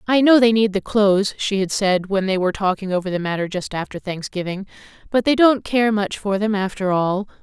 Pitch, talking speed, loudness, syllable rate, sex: 200 Hz, 225 wpm, -19 LUFS, 5.5 syllables/s, female